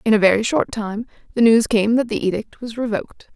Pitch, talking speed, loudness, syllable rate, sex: 225 Hz, 230 wpm, -19 LUFS, 5.8 syllables/s, female